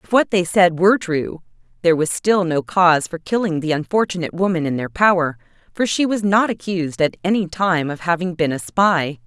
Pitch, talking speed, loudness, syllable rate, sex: 175 Hz, 205 wpm, -18 LUFS, 5.6 syllables/s, female